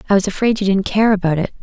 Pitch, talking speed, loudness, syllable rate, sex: 195 Hz, 295 wpm, -16 LUFS, 7.3 syllables/s, female